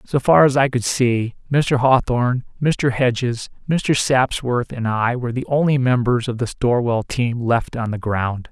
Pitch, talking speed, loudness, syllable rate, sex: 125 Hz, 185 wpm, -19 LUFS, 4.2 syllables/s, male